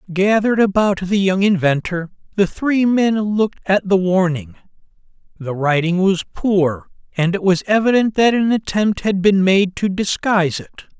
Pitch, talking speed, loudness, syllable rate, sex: 190 Hz, 160 wpm, -17 LUFS, 4.7 syllables/s, male